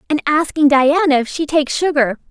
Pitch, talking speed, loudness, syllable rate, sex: 290 Hz, 180 wpm, -15 LUFS, 5.6 syllables/s, female